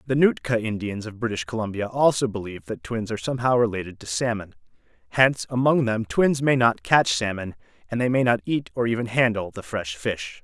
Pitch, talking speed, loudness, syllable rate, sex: 115 Hz, 195 wpm, -23 LUFS, 5.7 syllables/s, male